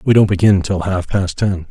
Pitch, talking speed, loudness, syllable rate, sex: 95 Hz, 245 wpm, -16 LUFS, 5.0 syllables/s, male